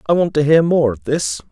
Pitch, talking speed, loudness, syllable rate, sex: 140 Hz, 275 wpm, -16 LUFS, 5.3 syllables/s, male